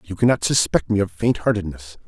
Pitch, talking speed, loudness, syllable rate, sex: 100 Hz, 205 wpm, -20 LUFS, 5.8 syllables/s, male